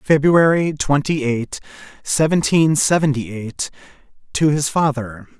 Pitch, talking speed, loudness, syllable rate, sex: 145 Hz, 100 wpm, -18 LUFS, 4.1 syllables/s, male